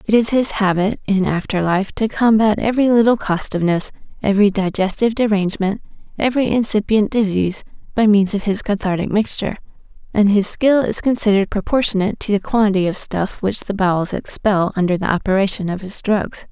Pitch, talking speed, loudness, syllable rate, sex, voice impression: 205 Hz, 165 wpm, -17 LUFS, 5.9 syllables/s, female, feminine, adult-like, slightly calm, slightly kind